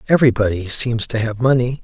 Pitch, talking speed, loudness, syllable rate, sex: 120 Hz, 165 wpm, -17 LUFS, 6.1 syllables/s, male